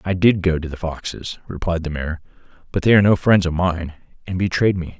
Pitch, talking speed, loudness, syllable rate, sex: 90 Hz, 230 wpm, -20 LUFS, 5.7 syllables/s, male